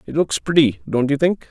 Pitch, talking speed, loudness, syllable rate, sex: 150 Hz, 240 wpm, -18 LUFS, 5.3 syllables/s, male